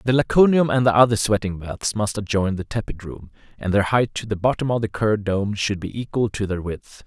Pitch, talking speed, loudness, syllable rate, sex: 105 Hz, 230 wpm, -21 LUFS, 5.6 syllables/s, male